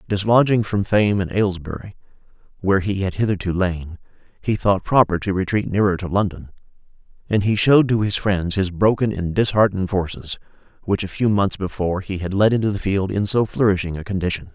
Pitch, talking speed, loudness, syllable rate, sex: 95 Hz, 185 wpm, -20 LUFS, 5.9 syllables/s, male